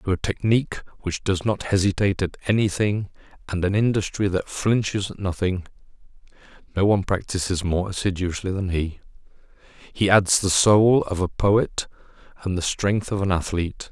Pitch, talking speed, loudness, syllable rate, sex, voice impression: 95 Hz, 145 wpm, -22 LUFS, 5.1 syllables/s, male, masculine, very adult-like, slightly thick, cool, slightly calm, reassuring, slightly elegant